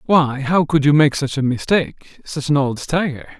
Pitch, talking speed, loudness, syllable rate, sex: 145 Hz, 195 wpm, -17 LUFS, 4.8 syllables/s, male